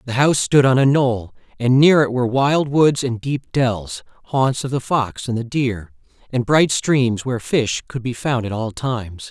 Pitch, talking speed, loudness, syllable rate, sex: 125 Hz, 215 wpm, -18 LUFS, 4.5 syllables/s, male